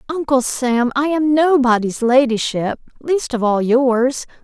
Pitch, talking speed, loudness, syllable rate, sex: 260 Hz, 135 wpm, -16 LUFS, 3.9 syllables/s, female